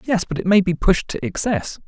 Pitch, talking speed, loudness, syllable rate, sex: 180 Hz, 255 wpm, -20 LUFS, 5.2 syllables/s, male